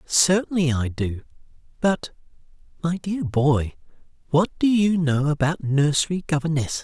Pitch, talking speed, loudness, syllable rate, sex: 155 Hz, 125 wpm, -22 LUFS, 4.5 syllables/s, male